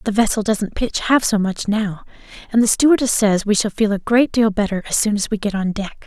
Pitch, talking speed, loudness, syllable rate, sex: 215 Hz, 255 wpm, -18 LUFS, 5.6 syllables/s, female